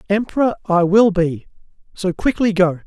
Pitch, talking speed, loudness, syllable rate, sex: 190 Hz, 145 wpm, -17 LUFS, 4.8 syllables/s, male